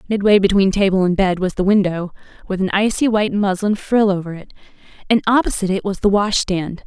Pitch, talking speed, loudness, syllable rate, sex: 195 Hz, 200 wpm, -17 LUFS, 6.0 syllables/s, female